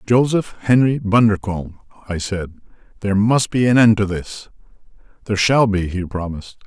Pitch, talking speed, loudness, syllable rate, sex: 105 Hz, 145 wpm, -18 LUFS, 5.5 syllables/s, male